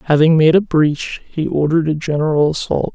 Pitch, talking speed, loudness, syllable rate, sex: 155 Hz, 185 wpm, -15 LUFS, 5.5 syllables/s, male